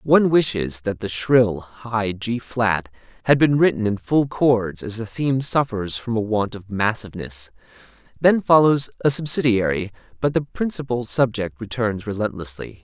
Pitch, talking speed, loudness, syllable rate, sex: 115 Hz, 155 wpm, -21 LUFS, 4.6 syllables/s, male